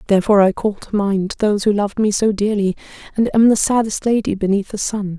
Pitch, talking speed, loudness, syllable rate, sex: 205 Hz, 220 wpm, -17 LUFS, 6.2 syllables/s, female